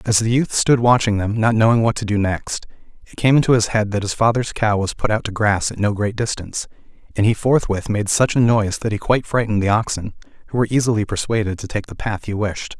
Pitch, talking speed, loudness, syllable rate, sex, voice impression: 110 Hz, 250 wpm, -19 LUFS, 6.1 syllables/s, male, masculine, adult-like, fluent, refreshing, sincere, friendly, kind